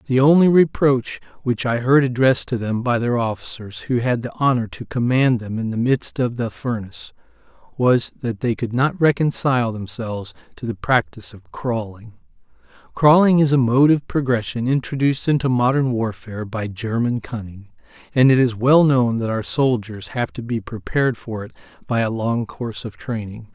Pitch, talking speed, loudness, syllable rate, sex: 120 Hz, 180 wpm, -20 LUFS, 5.1 syllables/s, male